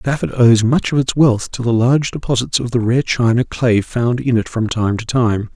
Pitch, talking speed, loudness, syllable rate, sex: 120 Hz, 240 wpm, -16 LUFS, 4.9 syllables/s, male